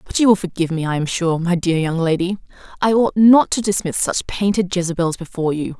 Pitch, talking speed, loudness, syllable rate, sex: 180 Hz, 230 wpm, -18 LUFS, 5.9 syllables/s, female